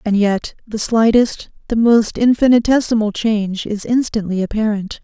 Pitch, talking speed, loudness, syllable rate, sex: 220 Hz, 130 wpm, -16 LUFS, 4.7 syllables/s, female